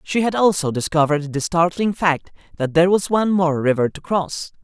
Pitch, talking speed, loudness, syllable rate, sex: 170 Hz, 195 wpm, -19 LUFS, 5.5 syllables/s, male